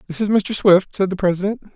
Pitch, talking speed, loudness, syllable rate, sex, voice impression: 190 Hz, 240 wpm, -18 LUFS, 6.0 syllables/s, male, masculine, adult-like, tensed, powerful, hard, slightly muffled, fluent, slightly raspy, intellectual, calm, slightly wild, lively, slightly modest